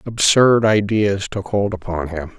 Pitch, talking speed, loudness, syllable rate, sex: 100 Hz, 150 wpm, -17 LUFS, 4.2 syllables/s, male